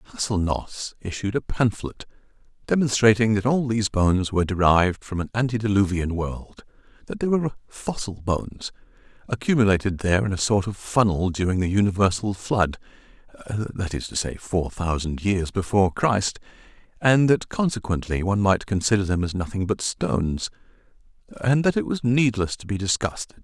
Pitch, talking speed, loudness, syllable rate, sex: 100 Hz, 150 wpm, -23 LUFS, 5.3 syllables/s, male